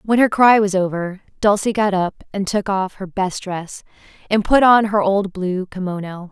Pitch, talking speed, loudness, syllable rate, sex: 195 Hz, 200 wpm, -18 LUFS, 4.5 syllables/s, female